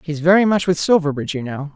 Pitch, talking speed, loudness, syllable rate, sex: 165 Hz, 240 wpm, -17 LUFS, 6.7 syllables/s, female